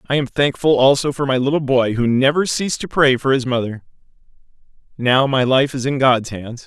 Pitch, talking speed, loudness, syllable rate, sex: 135 Hz, 205 wpm, -17 LUFS, 5.4 syllables/s, male